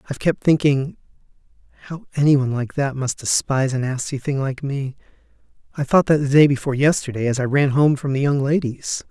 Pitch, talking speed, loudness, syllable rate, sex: 140 Hz, 200 wpm, -19 LUFS, 6.0 syllables/s, male